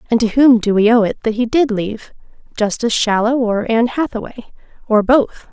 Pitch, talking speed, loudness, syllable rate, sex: 230 Hz, 185 wpm, -15 LUFS, 5.4 syllables/s, female